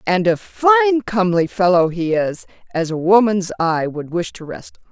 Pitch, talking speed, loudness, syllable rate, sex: 195 Hz, 195 wpm, -17 LUFS, 5.0 syllables/s, female